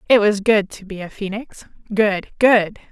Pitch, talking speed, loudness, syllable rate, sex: 205 Hz, 185 wpm, -18 LUFS, 4.3 syllables/s, female